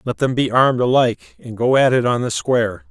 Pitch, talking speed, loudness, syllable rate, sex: 125 Hz, 250 wpm, -17 LUFS, 5.9 syllables/s, male